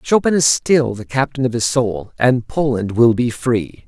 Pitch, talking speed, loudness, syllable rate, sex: 125 Hz, 185 wpm, -17 LUFS, 4.3 syllables/s, male